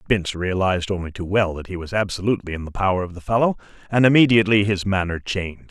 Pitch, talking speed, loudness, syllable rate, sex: 95 Hz, 210 wpm, -21 LUFS, 7.1 syllables/s, male